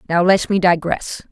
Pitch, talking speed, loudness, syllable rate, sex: 180 Hz, 185 wpm, -17 LUFS, 4.6 syllables/s, female